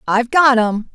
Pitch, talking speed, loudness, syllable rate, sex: 240 Hz, 190 wpm, -14 LUFS, 5.1 syllables/s, female